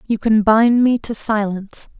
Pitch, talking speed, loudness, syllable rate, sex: 220 Hz, 180 wpm, -16 LUFS, 4.4 syllables/s, female